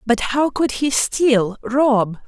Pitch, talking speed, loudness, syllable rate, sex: 250 Hz, 160 wpm, -18 LUFS, 2.9 syllables/s, female